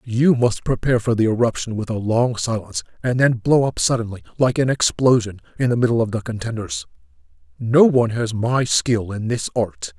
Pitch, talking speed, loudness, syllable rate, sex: 115 Hz, 190 wpm, -19 LUFS, 5.4 syllables/s, male